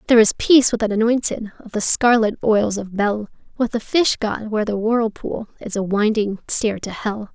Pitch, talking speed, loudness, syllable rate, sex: 220 Hz, 205 wpm, -19 LUFS, 5.1 syllables/s, female